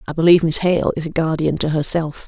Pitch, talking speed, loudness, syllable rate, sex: 160 Hz, 235 wpm, -17 LUFS, 6.3 syllables/s, female